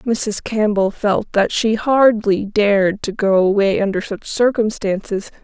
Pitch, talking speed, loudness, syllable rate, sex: 210 Hz, 145 wpm, -17 LUFS, 4.0 syllables/s, female